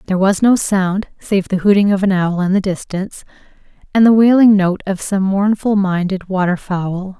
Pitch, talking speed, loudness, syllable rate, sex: 195 Hz, 190 wpm, -15 LUFS, 5.0 syllables/s, female